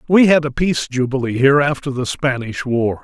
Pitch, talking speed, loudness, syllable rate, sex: 135 Hz, 200 wpm, -17 LUFS, 5.6 syllables/s, male